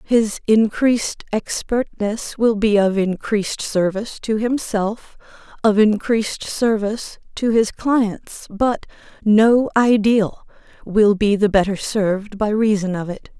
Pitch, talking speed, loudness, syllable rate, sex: 215 Hz, 125 wpm, -18 LUFS, 4.0 syllables/s, female